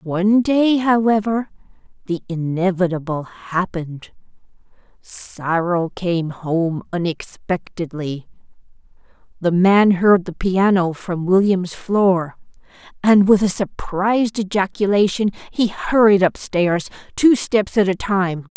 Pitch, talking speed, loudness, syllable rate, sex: 190 Hz, 100 wpm, -18 LUFS, 3.8 syllables/s, female